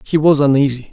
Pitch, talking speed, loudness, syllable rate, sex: 140 Hz, 195 wpm, -13 LUFS, 6.3 syllables/s, male